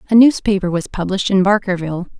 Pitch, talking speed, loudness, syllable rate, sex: 190 Hz, 165 wpm, -16 LUFS, 6.8 syllables/s, female